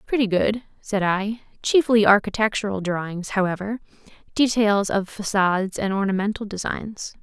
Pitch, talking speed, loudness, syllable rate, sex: 205 Hz, 110 wpm, -22 LUFS, 4.9 syllables/s, female